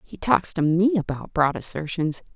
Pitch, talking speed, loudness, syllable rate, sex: 175 Hz, 180 wpm, -23 LUFS, 4.7 syllables/s, female